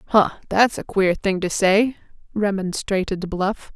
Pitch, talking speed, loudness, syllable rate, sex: 195 Hz, 145 wpm, -21 LUFS, 4.2 syllables/s, female